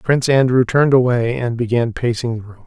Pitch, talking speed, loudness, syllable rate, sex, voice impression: 120 Hz, 205 wpm, -16 LUFS, 6.0 syllables/s, male, masculine, adult-like, tensed, slightly bright, clear, cool, slightly refreshing, sincere, slightly calm, friendly, slightly reassuring, slightly wild, kind, slightly modest